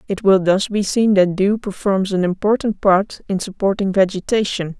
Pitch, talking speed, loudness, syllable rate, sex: 195 Hz, 175 wpm, -17 LUFS, 4.9 syllables/s, female